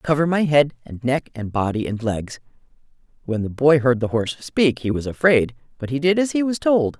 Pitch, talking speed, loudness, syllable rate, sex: 135 Hz, 225 wpm, -20 LUFS, 5.3 syllables/s, female